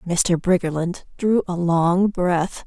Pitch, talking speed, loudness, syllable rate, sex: 175 Hz, 135 wpm, -20 LUFS, 3.5 syllables/s, female